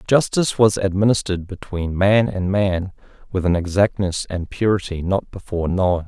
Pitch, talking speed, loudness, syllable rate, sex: 95 Hz, 150 wpm, -20 LUFS, 5.1 syllables/s, male